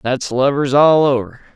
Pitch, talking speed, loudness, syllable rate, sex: 135 Hz, 155 wpm, -14 LUFS, 4.3 syllables/s, male